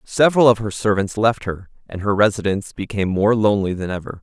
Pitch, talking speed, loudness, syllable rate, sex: 105 Hz, 200 wpm, -19 LUFS, 6.3 syllables/s, male